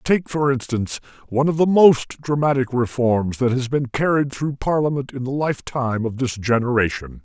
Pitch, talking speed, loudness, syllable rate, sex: 130 Hz, 175 wpm, -20 LUFS, 5.3 syllables/s, male